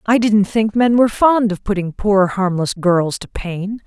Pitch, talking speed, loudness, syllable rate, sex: 205 Hz, 200 wpm, -16 LUFS, 4.3 syllables/s, female